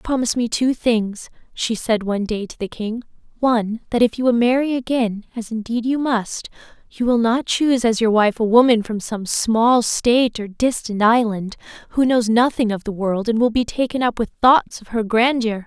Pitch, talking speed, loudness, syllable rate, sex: 230 Hz, 205 wpm, -19 LUFS, 4.8 syllables/s, female